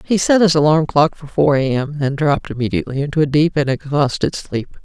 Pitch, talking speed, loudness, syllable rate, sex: 145 Hz, 225 wpm, -17 LUFS, 5.8 syllables/s, female